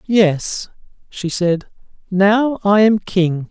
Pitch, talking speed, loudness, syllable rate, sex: 195 Hz, 120 wpm, -16 LUFS, 2.8 syllables/s, male